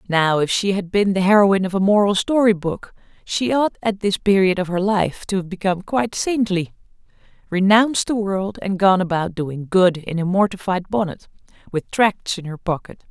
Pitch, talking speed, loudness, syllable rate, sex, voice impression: 195 Hz, 190 wpm, -19 LUFS, 5.1 syllables/s, female, feminine, adult-like, slightly clear, slightly intellectual, slightly unique